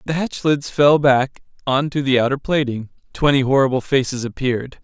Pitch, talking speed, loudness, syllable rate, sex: 135 Hz, 160 wpm, -18 LUFS, 5.4 syllables/s, male